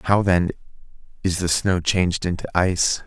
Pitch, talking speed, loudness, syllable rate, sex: 90 Hz, 175 wpm, -21 LUFS, 5.7 syllables/s, male